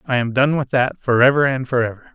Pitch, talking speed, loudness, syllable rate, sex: 125 Hz, 225 wpm, -17 LUFS, 6.3 syllables/s, male